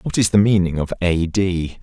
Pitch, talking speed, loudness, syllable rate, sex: 90 Hz, 230 wpm, -18 LUFS, 4.7 syllables/s, male